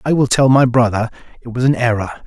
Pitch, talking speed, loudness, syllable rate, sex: 120 Hz, 240 wpm, -15 LUFS, 6.4 syllables/s, male